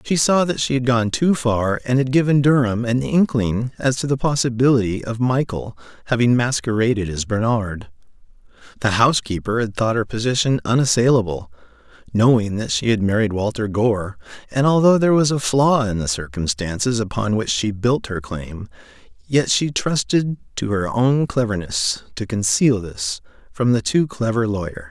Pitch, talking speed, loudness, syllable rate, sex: 115 Hz, 165 wpm, -19 LUFS, 4.9 syllables/s, male